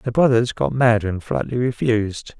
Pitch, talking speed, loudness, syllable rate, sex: 115 Hz, 175 wpm, -19 LUFS, 4.7 syllables/s, male